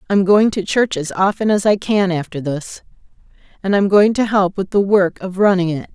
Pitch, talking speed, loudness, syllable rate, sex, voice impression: 190 Hz, 220 wpm, -16 LUFS, 5.1 syllables/s, female, very feminine, very adult-like, middle-aged, slightly thin, slightly tensed, slightly powerful, slightly bright, soft, clear, fluent, cool, intellectual, refreshing, very sincere, very calm, friendly, reassuring, very unique, elegant, slightly wild, sweet, slightly lively, kind, slightly modest